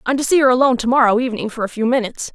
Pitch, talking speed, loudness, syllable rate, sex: 245 Hz, 305 wpm, -16 LUFS, 8.6 syllables/s, female